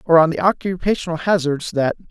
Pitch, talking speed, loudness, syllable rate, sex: 170 Hz, 170 wpm, -19 LUFS, 6.1 syllables/s, male